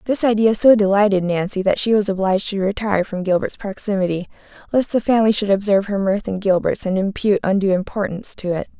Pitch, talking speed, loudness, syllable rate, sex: 200 Hz, 200 wpm, -18 LUFS, 6.4 syllables/s, female